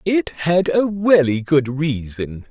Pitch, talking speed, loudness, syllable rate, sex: 155 Hz, 145 wpm, -18 LUFS, 3.4 syllables/s, male